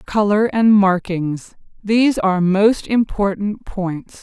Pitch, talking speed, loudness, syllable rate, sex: 200 Hz, 100 wpm, -17 LUFS, 3.7 syllables/s, female